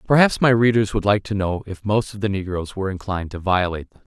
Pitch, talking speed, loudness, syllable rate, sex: 100 Hz, 260 wpm, -20 LUFS, 6.9 syllables/s, male